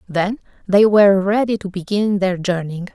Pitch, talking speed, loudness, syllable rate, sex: 195 Hz, 165 wpm, -17 LUFS, 4.8 syllables/s, female